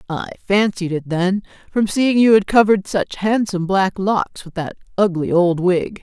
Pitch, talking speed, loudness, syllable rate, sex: 195 Hz, 180 wpm, -18 LUFS, 4.8 syllables/s, female